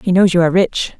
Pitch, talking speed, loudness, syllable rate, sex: 180 Hz, 305 wpm, -14 LUFS, 6.6 syllables/s, female